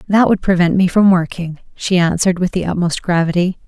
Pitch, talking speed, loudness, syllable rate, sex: 180 Hz, 195 wpm, -15 LUFS, 5.7 syllables/s, female